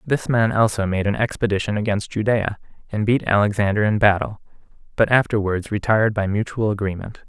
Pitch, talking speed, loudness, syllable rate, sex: 105 Hz, 155 wpm, -20 LUFS, 5.7 syllables/s, male